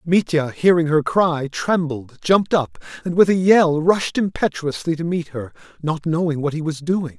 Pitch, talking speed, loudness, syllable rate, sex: 160 Hz, 185 wpm, -19 LUFS, 4.7 syllables/s, male